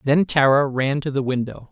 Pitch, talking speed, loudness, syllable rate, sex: 135 Hz, 210 wpm, -20 LUFS, 5.0 syllables/s, male